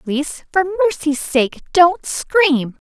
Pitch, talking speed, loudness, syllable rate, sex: 325 Hz, 125 wpm, -17 LUFS, 3.3 syllables/s, female